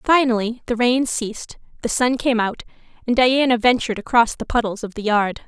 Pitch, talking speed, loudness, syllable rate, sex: 235 Hz, 185 wpm, -19 LUFS, 5.5 syllables/s, female